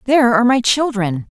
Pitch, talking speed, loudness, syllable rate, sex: 235 Hz, 180 wpm, -15 LUFS, 6.1 syllables/s, female